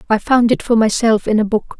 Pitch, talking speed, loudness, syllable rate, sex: 225 Hz, 270 wpm, -15 LUFS, 5.7 syllables/s, female